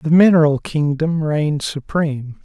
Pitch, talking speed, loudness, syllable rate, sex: 150 Hz, 125 wpm, -17 LUFS, 4.6 syllables/s, male